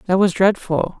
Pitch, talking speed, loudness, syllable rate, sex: 185 Hz, 180 wpm, -17 LUFS, 4.9 syllables/s, male